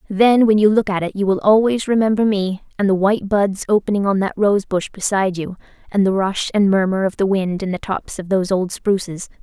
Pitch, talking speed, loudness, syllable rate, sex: 200 Hz, 230 wpm, -18 LUFS, 5.7 syllables/s, female